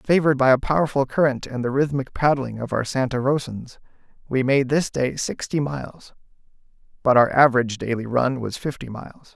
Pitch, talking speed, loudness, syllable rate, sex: 130 Hz, 175 wpm, -21 LUFS, 5.6 syllables/s, male